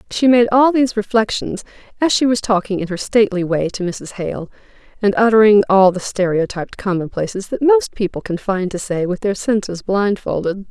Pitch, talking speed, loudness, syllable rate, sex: 205 Hz, 185 wpm, -17 LUFS, 5.4 syllables/s, female